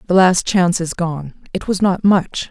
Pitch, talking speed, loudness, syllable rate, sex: 180 Hz, 215 wpm, -16 LUFS, 4.7 syllables/s, female